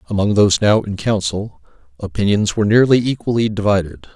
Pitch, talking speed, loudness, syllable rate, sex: 105 Hz, 145 wpm, -16 LUFS, 5.9 syllables/s, male